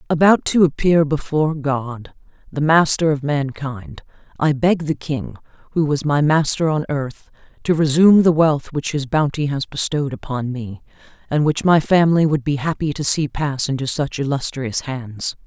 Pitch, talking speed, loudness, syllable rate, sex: 145 Hz, 170 wpm, -18 LUFS, 4.7 syllables/s, female